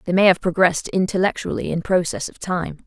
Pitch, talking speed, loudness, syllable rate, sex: 180 Hz, 190 wpm, -20 LUFS, 5.9 syllables/s, female